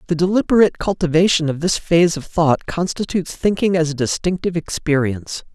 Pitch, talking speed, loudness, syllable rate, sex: 165 Hz, 150 wpm, -18 LUFS, 6.1 syllables/s, male